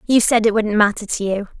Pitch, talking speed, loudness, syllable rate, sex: 215 Hz, 265 wpm, -17 LUFS, 5.9 syllables/s, female